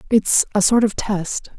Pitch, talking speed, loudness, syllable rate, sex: 205 Hz, 190 wpm, -18 LUFS, 4.0 syllables/s, female